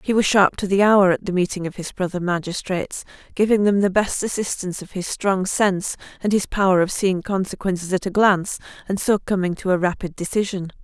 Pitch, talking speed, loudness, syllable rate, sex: 190 Hz, 205 wpm, -21 LUFS, 5.9 syllables/s, female